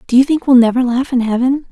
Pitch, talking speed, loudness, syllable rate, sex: 255 Hz, 280 wpm, -13 LUFS, 6.5 syllables/s, female